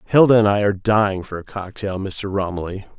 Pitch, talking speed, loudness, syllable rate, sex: 100 Hz, 200 wpm, -19 LUFS, 6.0 syllables/s, male